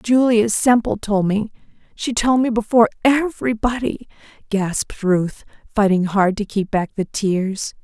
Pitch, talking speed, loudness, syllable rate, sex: 215 Hz, 130 wpm, -19 LUFS, 4.3 syllables/s, female